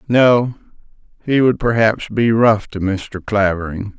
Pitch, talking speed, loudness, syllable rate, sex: 110 Hz, 135 wpm, -16 LUFS, 3.9 syllables/s, male